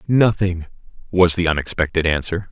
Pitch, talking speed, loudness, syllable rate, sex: 90 Hz, 120 wpm, -18 LUFS, 5.2 syllables/s, male